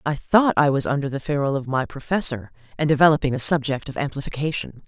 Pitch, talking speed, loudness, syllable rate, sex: 140 Hz, 195 wpm, -21 LUFS, 6.5 syllables/s, female